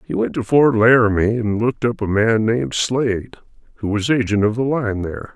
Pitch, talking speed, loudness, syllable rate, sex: 110 Hz, 215 wpm, -18 LUFS, 5.5 syllables/s, male